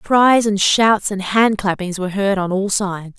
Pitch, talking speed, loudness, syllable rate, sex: 200 Hz, 190 wpm, -16 LUFS, 4.4 syllables/s, female